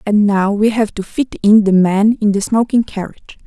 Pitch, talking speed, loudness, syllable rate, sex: 210 Hz, 225 wpm, -14 LUFS, 5.0 syllables/s, female